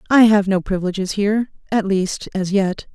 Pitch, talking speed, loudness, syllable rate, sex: 200 Hz, 185 wpm, -18 LUFS, 5.3 syllables/s, female